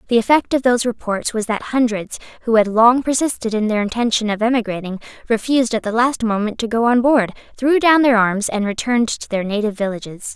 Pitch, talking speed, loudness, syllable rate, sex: 230 Hz, 210 wpm, -17 LUFS, 6.0 syllables/s, female